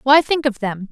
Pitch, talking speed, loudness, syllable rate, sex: 255 Hz, 265 wpm, -17 LUFS, 4.9 syllables/s, female